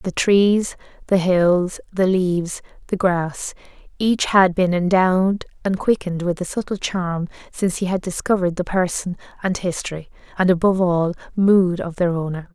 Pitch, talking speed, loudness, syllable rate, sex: 180 Hz, 155 wpm, -20 LUFS, 4.8 syllables/s, female